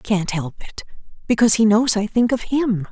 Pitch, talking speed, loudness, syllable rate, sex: 215 Hz, 225 wpm, -18 LUFS, 5.8 syllables/s, female